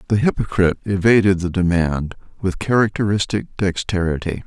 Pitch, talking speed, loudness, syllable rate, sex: 95 Hz, 110 wpm, -19 LUFS, 5.4 syllables/s, male